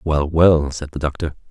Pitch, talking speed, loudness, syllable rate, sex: 75 Hz, 200 wpm, -18 LUFS, 4.7 syllables/s, male